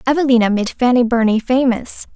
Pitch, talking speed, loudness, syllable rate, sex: 240 Hz, 140 wpm, -15 LUFS, 5.6 syllables/s, female